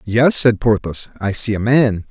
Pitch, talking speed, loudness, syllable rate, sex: 110 Hz, 200 wpm, -16 LUFS, 4.3 syllables/s, male